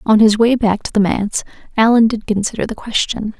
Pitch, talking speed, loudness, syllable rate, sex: 220 Hz, 210 wpm, -15 LUFS, 5.8 syllables/s, female